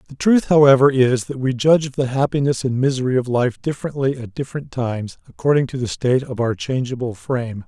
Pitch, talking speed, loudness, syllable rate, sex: 130 Hz, 205 wpm, -19 LUFS, 6.1 syllables/s, male